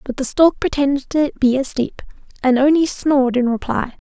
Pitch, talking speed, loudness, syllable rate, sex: 270 Hz, 175 wpm, -17 LUFS, 5.2 syllables/s, female